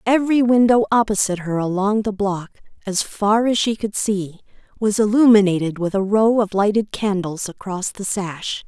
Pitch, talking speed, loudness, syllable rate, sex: 205 Hz, 165 wpm, -19 LUFS, 4.9 syllables/s, female